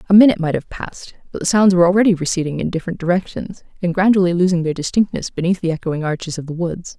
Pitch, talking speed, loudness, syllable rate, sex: 175 Hz, 225 wpm, -17 LUFS, 7.1 syllables/s, female